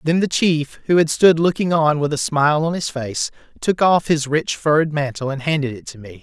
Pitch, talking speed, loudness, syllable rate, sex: 155 Hz, 240 wpm, -18 LUFS, 5.2 syllables/s, male